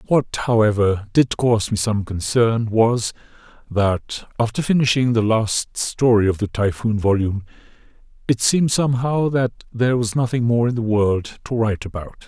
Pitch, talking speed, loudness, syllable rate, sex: 115 Hz, 155 wpm, -19 LUFS, 4.8 syllables/s, male